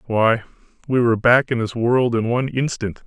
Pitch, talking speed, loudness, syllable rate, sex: 120 Hz, 195 wpm, -19 LUFS, 5.3 syllables/s, male